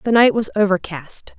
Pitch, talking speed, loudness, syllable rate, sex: 200 Hz, 175 wpm, -17 LUFS, 5.1 syllables/s, female